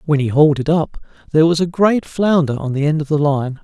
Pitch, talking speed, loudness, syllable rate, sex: 155 Hz, 265 wpm, -16 LUFS, 6.0 syllables/s, male